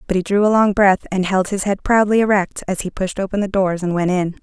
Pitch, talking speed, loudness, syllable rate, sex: 195 Hz, 285 wpm, -17 LUFS, 5.8 syllables/s, female